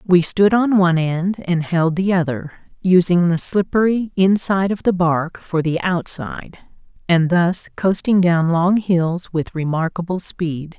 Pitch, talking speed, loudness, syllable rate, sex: 175 Hz, 155 wpm, -18 LUFS, 4.1 syllables/s, female